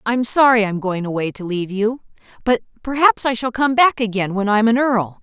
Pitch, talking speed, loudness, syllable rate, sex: 225 Hz, 220 wpm, -18 LUFS, 5.4 syllables/s, female